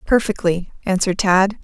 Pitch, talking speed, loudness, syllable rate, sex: 195 Hz, 110 wpm, -18 LUFS, 5.1 syllables/s, female